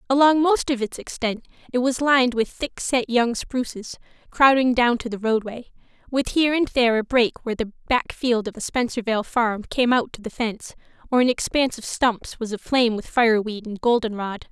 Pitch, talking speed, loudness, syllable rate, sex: 240 Hz, 200 wpm, -22 LUFS, 5.5 syllables/s, female